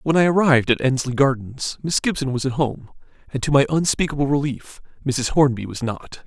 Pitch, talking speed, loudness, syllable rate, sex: 135 Hz, 190 wpm, -20 LUFS, 5.4 syllables/s, male